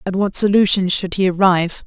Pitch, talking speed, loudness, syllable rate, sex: 190 Hz, 195 wpm, -16 LUFS, 5.7 syllables/s, female